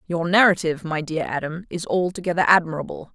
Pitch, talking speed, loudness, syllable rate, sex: 170 Hz, 150 wpm, -21 LUFS, 6.0 syllables/s, female